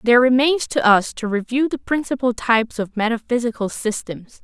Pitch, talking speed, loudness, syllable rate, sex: 235 Hz, 160 wpm, -19 LUFS, 5.3 syllables/s, female